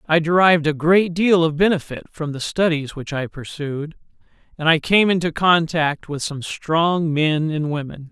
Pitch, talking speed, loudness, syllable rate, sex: 160 Hz, 175 wpm, -19 LUFS, 4.6 syllables/s, male